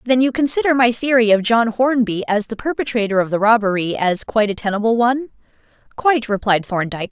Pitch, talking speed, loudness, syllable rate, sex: 225 Hz, 185 wpm, -17 LUFS, 6.3 syllables/s, female